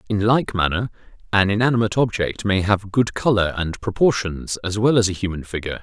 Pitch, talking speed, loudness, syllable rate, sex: 105 Hz, 185 wpm, -20 LUFS, 5.8 syllables/s, male